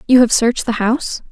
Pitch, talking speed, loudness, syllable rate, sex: 240 Hz, 230 wpm, -15 LUFS, 6.4 syllables/s, female